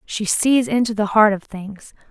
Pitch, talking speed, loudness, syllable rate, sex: 210 Hz, 200 wpm, -17 LUFS, 4.3 syllables/s, female